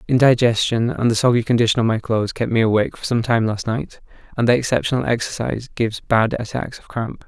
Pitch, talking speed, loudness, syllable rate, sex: 115 Hz, 205 wpm, -19 LUFS, 6.3 syllables/s, male